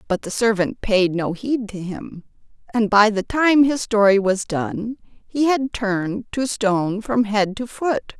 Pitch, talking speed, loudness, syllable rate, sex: 215 Hz, 185 wpm, -20 LUFS, 4.0 syllables/s, female